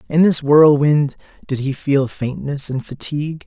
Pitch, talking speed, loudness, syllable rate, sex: 145 Hz, 155 wpm, -17 LUFS, 4.4 syllables/s, male